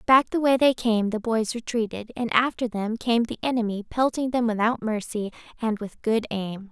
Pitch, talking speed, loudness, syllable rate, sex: 230 Hz, 195 wpm, -25 LUFS, 5.0 syllables/s, female